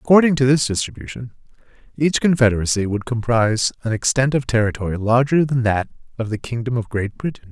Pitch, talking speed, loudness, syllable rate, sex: 120 Hz, 170 wpm, -19 LUFS, 6.0 syllables/s, male